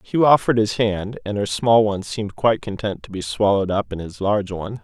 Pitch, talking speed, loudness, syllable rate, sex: 105 Hz, 235 wpm, -20 LUFS, 6.2 syllables/s, male